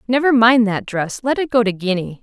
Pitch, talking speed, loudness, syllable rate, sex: 225 Hz, 245 wpm, -16 LUFS, 5.4 syllables/s, female